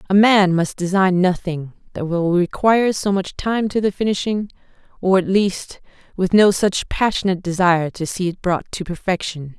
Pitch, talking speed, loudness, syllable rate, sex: 185 Hz, 175 wpm, -18 LUFS, 4.9 syllables/s, female